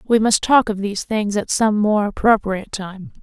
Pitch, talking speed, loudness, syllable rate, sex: 210 Hz, 205 wpm, -18 LUFS, 4.9 syllables/s, female